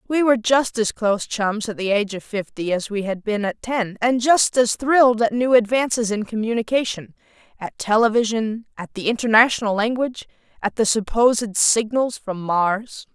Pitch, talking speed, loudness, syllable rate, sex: 220 Hz, 175 wpm, -20 LUFS, 5.1 syllables/s, female